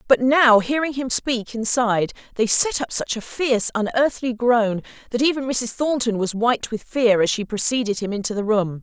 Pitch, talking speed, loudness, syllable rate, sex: 235 Hz, 195 wpm, -20 LUFS, 5.1 syllables/s, female